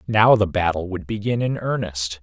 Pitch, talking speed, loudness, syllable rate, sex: 100 Hz, 190 wpm, -21 LUFS, 4.8 syllables/s, male